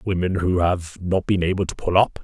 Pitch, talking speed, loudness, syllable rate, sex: 90 Hz, 240 wpm, -21 LUFS, 5.8 syllables/s, male